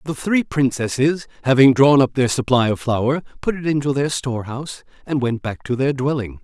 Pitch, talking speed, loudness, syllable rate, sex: 135 Hz, 195 wpm, -19 LUFS, 5.3 syllables/s, male